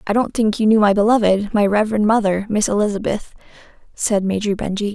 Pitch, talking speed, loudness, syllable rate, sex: 210 Hz, 180 wpm, -17 LUFS, 6.0 syllables/s, female